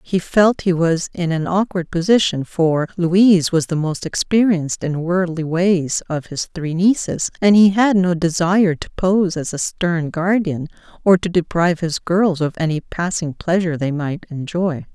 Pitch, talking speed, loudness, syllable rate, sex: 175 Hz, 175 wpm, -18 LUFS, 4.5 syllables/s, female